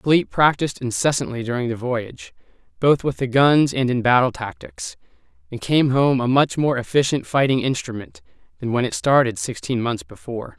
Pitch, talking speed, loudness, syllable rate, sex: 130 Hz, 175 wpm, -20 LUFS, 5.3 syllables/s, male